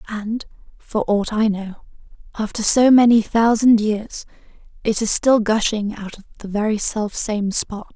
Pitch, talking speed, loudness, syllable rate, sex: 215 Hz, 150 wpm, -18 LUFS, 4.3 syllables/s, female